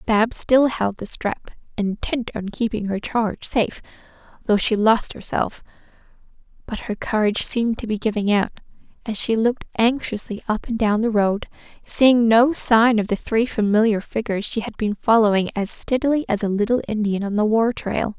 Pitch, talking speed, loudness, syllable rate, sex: 220 Hz, 180 wpm, -20 LUFS, 5.1 syllables/s, female